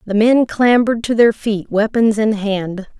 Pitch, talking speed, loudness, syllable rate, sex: 215 Hz, 180 wpm, -15 LUFS, 4.3 syllables/s, female